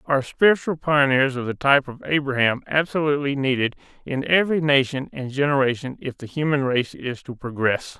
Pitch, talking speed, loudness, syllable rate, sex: 135 Hz, 165 wpm, -21 LUFS, 5.7 syllables/s, male